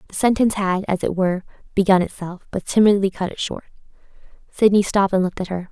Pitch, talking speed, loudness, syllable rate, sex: 190 Hz, 200 wpm, -20 LUFS, 7.0 syllables/s, female